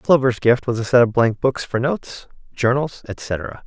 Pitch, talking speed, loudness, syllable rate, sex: 125 Hz, 195 wpm, -19 LUFS, 4.5 syllables/s, male